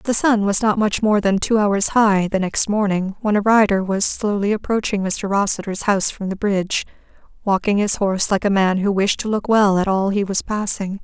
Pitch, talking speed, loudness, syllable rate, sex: 200 Hz, 225 wpm, -18 LUFS, 5.2 syllables/s, female